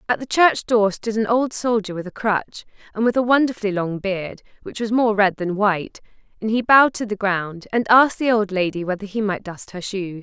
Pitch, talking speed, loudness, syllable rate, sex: 210 Hz, 235 wpm, -20 LUFS, 5.4 syllables/s, female